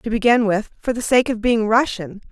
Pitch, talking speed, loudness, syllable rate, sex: 225 Hz, 235 wpm, -18 LUFS, 5.2 syllables/s, female